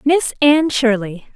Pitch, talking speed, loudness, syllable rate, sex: 260 Hz, 135 wpm, -15 LUFS, 4.3 syllables/s, female